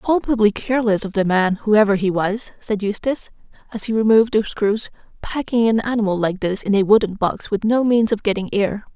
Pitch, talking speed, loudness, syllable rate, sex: 210 Hz, 210 wpm, -19 LUFS, 5.7 syllables/s, female